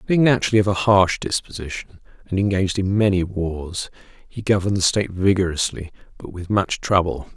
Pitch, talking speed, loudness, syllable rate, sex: 95 Hz, 165 wpm, -20 LUFS, 5.7 syllables/s, male